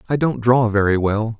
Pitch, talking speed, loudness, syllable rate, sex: 115 Hz, 215 wpm, -17 LUFS, 5.0 syllables/s, male